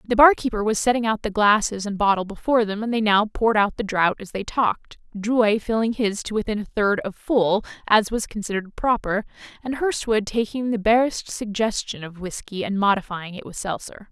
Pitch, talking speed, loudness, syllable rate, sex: 215 Hz, 200 wpm, -22 LUFS, 5.4 syllables/s, female